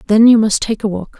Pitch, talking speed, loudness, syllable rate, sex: 215 Hz, 300 wpm, -13 LUFS, 5.9 syllables/s, female